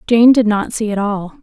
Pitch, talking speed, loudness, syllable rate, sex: 215 Hz, 255 wpm, -14 LUFS, 4.8 syllables/s, female